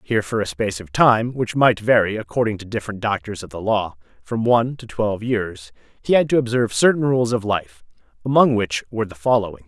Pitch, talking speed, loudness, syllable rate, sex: 110 Hz, 210 wpm, -20 LUFS, 6.0 syllables/s, male